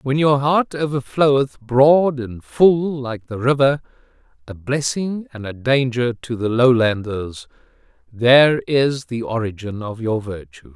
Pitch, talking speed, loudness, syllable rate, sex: 125 Hz, 140 wpm, -18 LUFS, 4.0 syllables/s, male